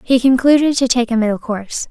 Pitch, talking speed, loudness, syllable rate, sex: 245 Hz, 220 wpm, -15 LUFS, 6.1 syllables/s, female